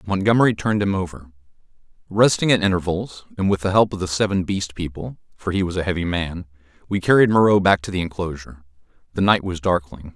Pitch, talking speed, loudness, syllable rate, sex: 90 Hz, 195 wpm, -20 LUFS, 5.7 syllables/s, male